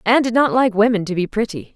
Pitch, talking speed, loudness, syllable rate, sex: 220 Hz, 275 wpm, -17 LUFS, 6.7 syllables/s, female